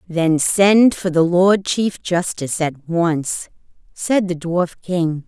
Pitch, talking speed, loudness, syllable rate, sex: 175 Hz, 150 wpm, -17 LUFS, 3.3 syllables/s, female